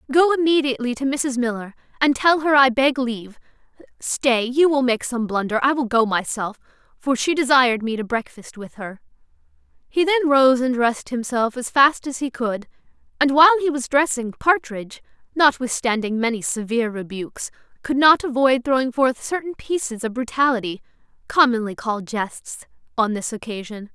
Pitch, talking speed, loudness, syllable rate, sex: 250 Hz, 160 wpm, -20 LUFS, 5.3 syllables/s, female